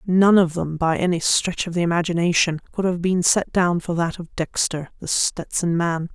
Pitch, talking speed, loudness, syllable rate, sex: 175 Hz, 205 wpm, -21 LUFS, 4.8 syllables/s, female